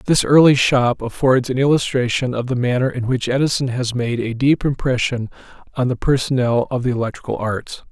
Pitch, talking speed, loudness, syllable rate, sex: 125 Hz, 180 wpm, -18 LUFS, 5.4 syllables/s, male